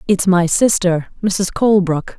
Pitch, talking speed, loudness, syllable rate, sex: 185 Hz, 135 wpm, -15 LUFS, 4.3 syllables/s, female